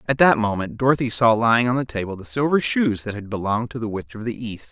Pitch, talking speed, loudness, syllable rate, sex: 115 Hz, 265 wpm, -21 LUFS, 6.4 syllables/s, male